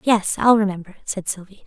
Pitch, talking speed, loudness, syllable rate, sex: 200 Hz, 180 wpm, -20 LUFS, 5.5 syllables/s, female